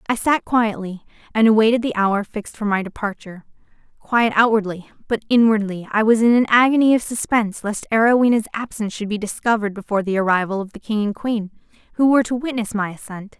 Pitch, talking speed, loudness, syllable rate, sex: 215 Hz, 185 wpm, -19 LUFS, 6.3 syllables/s, female